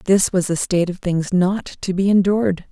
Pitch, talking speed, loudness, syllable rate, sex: 185 Hz, 220 wpm, -19 LUFS, 5.1 syllables/s, female